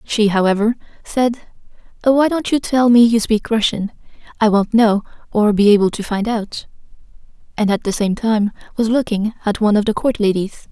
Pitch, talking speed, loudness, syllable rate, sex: 220 Hz, 185 wpm, -16 LUFS, 5.2 syllables/s, female